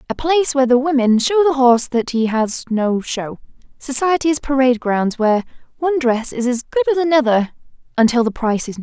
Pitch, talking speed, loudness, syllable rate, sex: 260 Hz, 195 wpm, -17 LUFS, 6.1 syllables/s, female